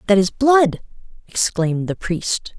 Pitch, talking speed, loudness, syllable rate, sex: 205 Hz, 140 wpm, -18 LUFS, 4.2 syllables/s, female